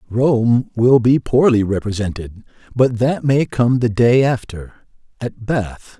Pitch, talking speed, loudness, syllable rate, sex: 120 Hz, 140 wpm, -16 LUFS, 3.7 syllables/s, male